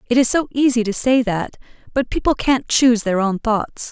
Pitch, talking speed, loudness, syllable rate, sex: 235 Hz, 215 wpm, -18 LUFS, 5.1 syllables/s, female